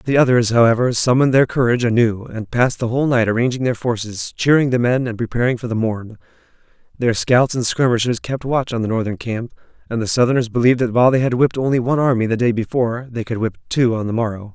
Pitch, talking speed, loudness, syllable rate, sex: 120 Hz, 225 wpm, -18 LUFS, 6.6 syllables/s, male